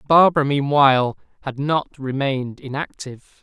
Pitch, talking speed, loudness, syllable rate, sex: 135 Hz, 105 wpm, -19 LUFS, 5.1 syllables/s, male